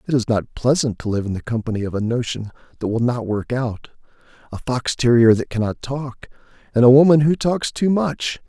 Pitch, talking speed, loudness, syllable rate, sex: 125 Hz, 210 wpm, -19 LUFS, 5.3 syllables/s, male